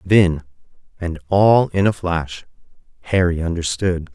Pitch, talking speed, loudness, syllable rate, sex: 90 Hz, 115 wpm, -18 LUFS, 4.0 syllables/s, male